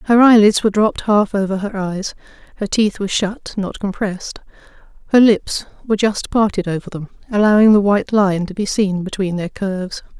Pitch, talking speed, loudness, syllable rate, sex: 200 Hz, 180 wpm, -16 LUFS, 5.5 syllables/s, female